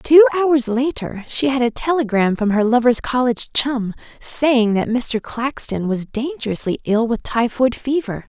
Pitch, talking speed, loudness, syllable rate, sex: 245 Hz, 160 wpm, -18 LUFS, 4.4 syllables/s, female